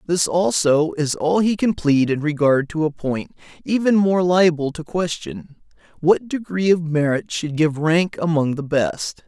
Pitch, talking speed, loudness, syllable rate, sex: 165 Hz, 170 wpm, -19 LUFS, 4.2 syllables/s, male